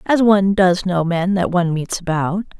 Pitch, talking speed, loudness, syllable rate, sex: 185 Hz, 210 wpm, -17 LUFS, 5.1 syllables/s, female